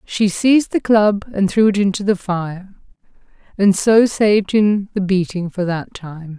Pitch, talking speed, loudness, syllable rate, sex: 200 Hz, 180 wpm, -16 LUFS, 4.3 syllables/s, female